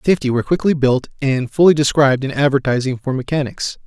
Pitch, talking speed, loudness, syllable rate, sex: 140 Hz, 170 wpm, -17 LUFS, 6.1 syllables/s, male